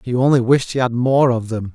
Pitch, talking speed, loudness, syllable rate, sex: 125 Hz, 275 wpm, -17 LUFS, 5.5 syllables/s, male